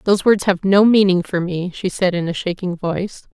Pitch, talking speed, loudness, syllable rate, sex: 185 Hz, 235 wpm, -17 LUFS, 5.4 syllables/s, female